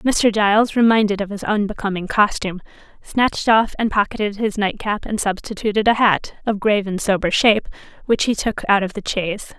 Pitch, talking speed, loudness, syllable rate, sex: 210 Hz, 180 wpm, -19 LUFS, 5.6 syllables/s, female